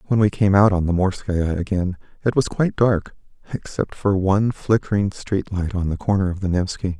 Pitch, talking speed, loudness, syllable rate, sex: 95 Hz, 205 wpm, -21 LUFS, 5.3 syllables/s, male